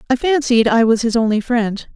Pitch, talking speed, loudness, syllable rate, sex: 235 Hz, 215 wpm, -16 LUFS, 5.2 syllables/s, female